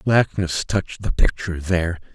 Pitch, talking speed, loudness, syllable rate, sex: 90 Hz, 140 wpm, -22 LUFS, 5.1 syllables/s, male